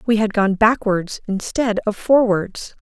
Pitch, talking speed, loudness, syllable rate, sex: 210 Hz, 150 wpm, -18 LUFS, 4.0 syllables/s, female